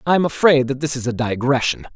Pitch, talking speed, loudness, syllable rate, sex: 135 Hz, 245 wpm, -18 LUFS, 6.2 syllables/s, male